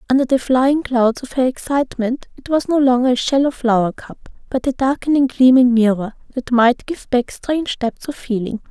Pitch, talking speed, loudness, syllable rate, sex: 255 Hz, 195 wpm, -17 LUFS, 5.1 syllables/s, female